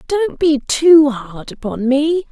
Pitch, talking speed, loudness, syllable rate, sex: 290 Hz, 155 wpm, -14 LUFS, 3.5 syllables/s, female